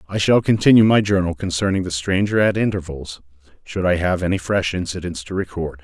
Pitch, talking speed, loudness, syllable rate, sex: 90 Hz, 185 wpm, -19 LUFS, 5.7 syllables/s, male